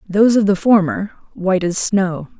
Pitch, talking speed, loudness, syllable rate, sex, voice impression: 195 Hz, 175 wpm, -16 LUFS, 5.0 syllables/s, female, feminine, adult-like, intellectual, slightly calm, slightly lively